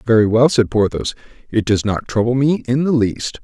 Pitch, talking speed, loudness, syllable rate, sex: 115 Hz, 210 wpm, -17 LUFS, 5.2 syllables/s, male